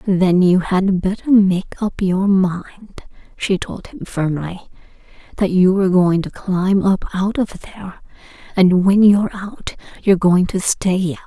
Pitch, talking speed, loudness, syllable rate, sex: 190 Hz, 165 wpm, -16 LUFS, 4.3 syllables/s, female